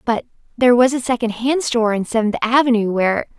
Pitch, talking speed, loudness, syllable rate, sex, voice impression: 235 Hz, 175 wpm, -17 LUFS, 6.6 syllables/s, female, feminine, adult-like, clear, slightly calm, friendly, slightly unique